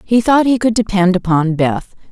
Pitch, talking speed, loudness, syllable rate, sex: 200 Hz, 200 wpm, -14 LUFS, 4.8 syllables/s, female